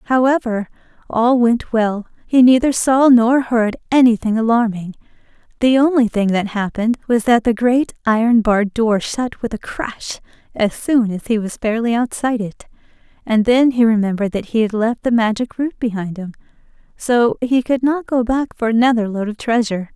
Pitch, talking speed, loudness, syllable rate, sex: 230 Hz, 175 wpm, -16 LUFS, 5.0 syllables/s, female